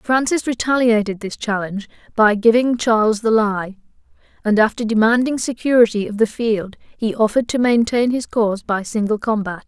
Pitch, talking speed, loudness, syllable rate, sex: 225 Hz, 155 wpm, -18 LUFS, 5.3 syllables/s, female